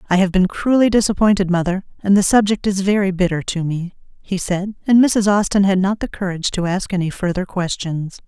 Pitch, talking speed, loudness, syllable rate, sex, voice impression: 190 Hz, 205 wpm, -18 LUFS, 5.6 syllables/s, female, feminine, adult-like, tensed, bright, soft, clear, fluent, intellectual, friendly, unique, elegant, kind, slightly strict